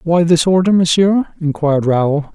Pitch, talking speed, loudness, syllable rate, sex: 165 Hz, 155 wpm, -14 LUFS, 4.8 syllables/s, male